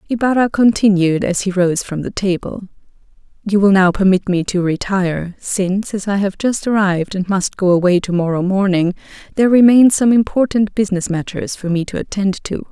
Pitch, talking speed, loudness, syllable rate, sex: 195 Hz, 180 wpm, -15 LUFS, 5.4 syllables/s, female